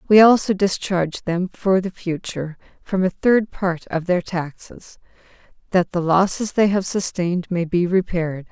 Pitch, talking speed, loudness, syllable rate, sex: 180 Hz, 160 wpm, -20 LUFS, 4.7 syllables/s, female